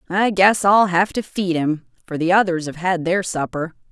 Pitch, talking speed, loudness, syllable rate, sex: 180 Hz, 215 wpm, -19 LUFS, 4.7 syllables/s, female